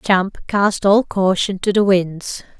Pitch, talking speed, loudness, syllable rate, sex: 195 Hz, 160 wpm, -17 LUFS, 3.5 syllables/s, female